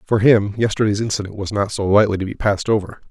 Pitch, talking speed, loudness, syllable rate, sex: 105 Hz, 230 wpm, -18 LUFS, 6.7 syllables/s, male